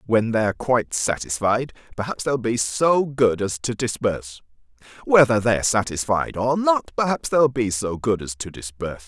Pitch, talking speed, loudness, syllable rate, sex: 115 Hz, 165 wpm, -21 LUFS, 4.9 syllables/s, male